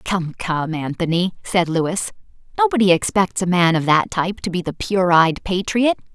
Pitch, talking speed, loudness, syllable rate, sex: 180 Hz, 175 wpm, -19 LUFS, 4.7 syllables/s, female